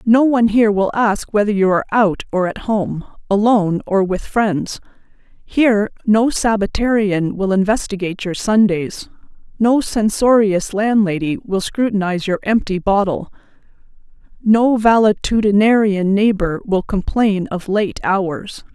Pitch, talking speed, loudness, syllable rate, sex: 205 Hz, 125 wpm, -16 LUFS, 4.5 syllables/s, female